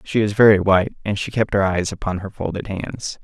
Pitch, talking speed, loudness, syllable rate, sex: 100 Hz, 240 wpm, -19 LUFS, 5.6 syllables/s, male